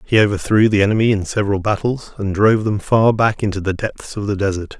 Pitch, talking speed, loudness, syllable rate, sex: 105 Hz, 225 wpm, -17 LUFS, 6.1 syllables/s, male